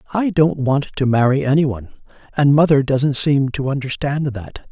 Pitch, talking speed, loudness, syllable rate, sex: 140 Hz, 180 wpm, -17 LUFS, 5.1 syllables/s, male